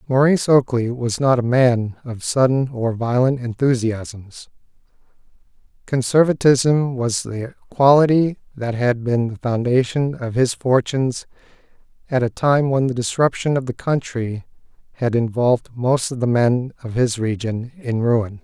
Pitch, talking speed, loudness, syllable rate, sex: 125 Hz, 140 wpm, -19 LUFS, 4.3 syllables/s, male